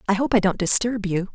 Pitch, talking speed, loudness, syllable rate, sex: 205 Hz, 270 wpm, -21 LUFS, 6.1 syllables/s, female